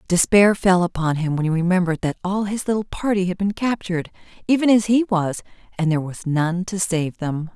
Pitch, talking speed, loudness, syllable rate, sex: 185 Hz, 205 wpm, -20 LUFS, 5.6 syllables/s, female